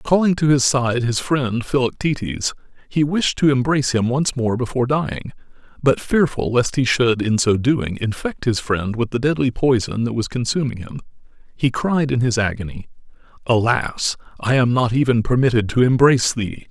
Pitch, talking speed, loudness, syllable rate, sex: 125 Hz, 175 wpm, -19 LUFS, 5.1 syllables/s, male